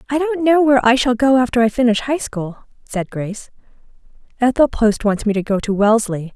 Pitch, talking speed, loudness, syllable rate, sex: 235 Hz, 210 wpm, -17 LUFS, 5.8 syllables/s, female